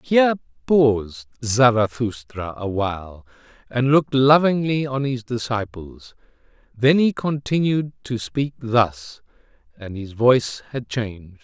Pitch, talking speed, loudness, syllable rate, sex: 120 Hz, 105 wpm, -20 LUFS, 4.0 syllables/s, male